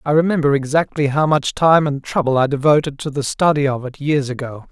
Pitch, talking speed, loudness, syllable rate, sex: 145 Hz, 215 wpm, -17 LUFS, 5.7 syllables/s, male